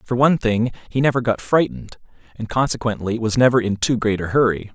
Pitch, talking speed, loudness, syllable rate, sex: 115 Hz, 200 wpm, -19 LUFS, 6.0 syllables/s, male